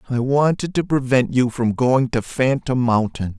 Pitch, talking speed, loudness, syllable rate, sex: 125 Hz, 175 wpm, -19 LUFS, 4.4 syllables/s, male